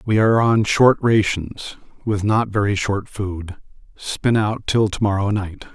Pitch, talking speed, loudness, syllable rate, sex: 105 Hz, 165 wpm, -19 LUFS, 4.1 syllables/s, male